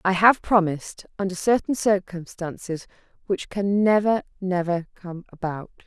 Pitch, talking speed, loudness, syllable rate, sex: 190 Hz, 125 wpm, -23 LUFS, 4.6 syllables/s, female